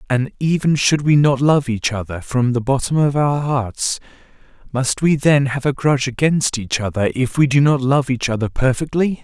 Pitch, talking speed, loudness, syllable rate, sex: 135 Hz, 195 wpm, -17 LUFS, 4.9 syllables/s, male